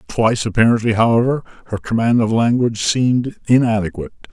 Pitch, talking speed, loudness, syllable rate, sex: 115 Hz, 125 wpm, -16 LUFS, 6.4 syllables/s, male